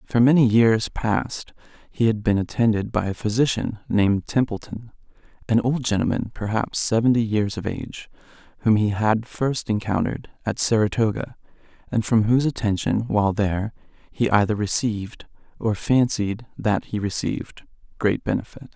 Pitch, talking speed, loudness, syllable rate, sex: 110 Hz, 135 wpm, -22 LUFS, 5.0 syllables/s, male